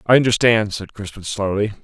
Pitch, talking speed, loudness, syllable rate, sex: 110 Hz, 165 wpm, -18 LUFS, 5.5 syllables/s, male